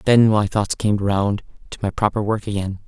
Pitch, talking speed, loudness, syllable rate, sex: 105 Hz, 210 wpm, -20 LUFS, 5.0 syllables/s, male